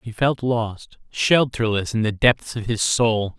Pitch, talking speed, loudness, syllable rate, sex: 115 Hz, 175 wpm, -20 LUFS, 3.8 syllables/s, male